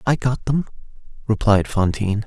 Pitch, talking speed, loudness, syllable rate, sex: 115 Hz, 130 wpm, -20 LUFS, 5.2 syllables/s, male